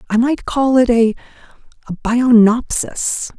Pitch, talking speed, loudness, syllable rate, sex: 235 Hz, 105 wpm, -15 LUFS, 3.6 syllables/s, female